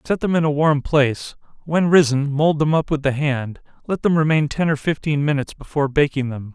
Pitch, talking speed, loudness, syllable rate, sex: 150 Hz, 200 wpm, -19 LUFS, 5.6 syllables/s, male